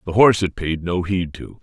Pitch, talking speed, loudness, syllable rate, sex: 90 Hz, 260 wpm, -20 LUFS, 5.4 syllables/s, male